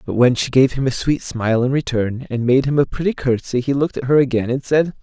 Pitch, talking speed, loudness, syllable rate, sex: 130 Hz, 275 wpm, -18 LUFS, 6.2 syllables/s, male